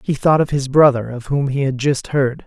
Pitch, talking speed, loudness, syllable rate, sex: 135 Hz, 265 wpm, -17 LUFS, 5.1 syllables/s, male